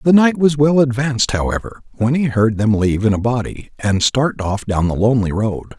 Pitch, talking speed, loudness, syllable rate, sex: 120 Hz, 220 wpm, -16 LUFS, 5.3 syllables/s, male